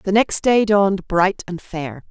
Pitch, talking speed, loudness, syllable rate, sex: 190 Hz, 200 wpm, -18 LUFS, 4.0 syllables/s, female